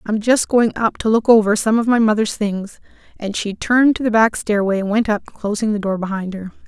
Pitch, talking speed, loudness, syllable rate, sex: 215 Hz, 245 wpm, -17 LUFS, 5.4 syllables/s, female